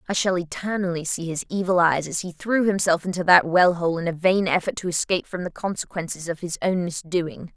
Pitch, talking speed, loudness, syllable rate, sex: 175 Hz, 220 wpm, -23 LUFS, 5.6 syllables/s, female